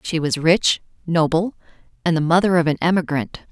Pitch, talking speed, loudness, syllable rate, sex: 165 Hz, 170 wpm, -19 LUFS, 5.3 syllables/s, female